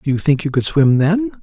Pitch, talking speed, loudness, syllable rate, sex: 155 Hz, 295 wpm, -15 LUFS, 5.4 syllables/s, male